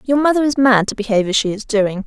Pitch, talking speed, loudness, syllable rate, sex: 230 Hz, 290 wpm, -16 LUFS, 6.6 syllables/s, female